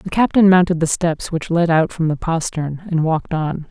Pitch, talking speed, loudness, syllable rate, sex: 165 Hz, 225 wpm, -17 LUFS, 5.0 syllables/s, female